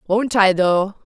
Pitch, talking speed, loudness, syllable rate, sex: 200 Hz, 160 wpm, -17 LUFS, 3.2 syllables/s, female